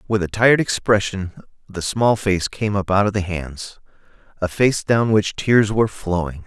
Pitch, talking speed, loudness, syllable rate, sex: 100 Hz, 175 wpm, -19 LUFS, 4.6 syllables/s, male